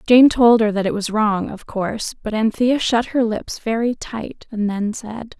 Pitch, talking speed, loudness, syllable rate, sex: 220 Hz, 210 wpm, -19 LUFS, 4.3 syllables/s, female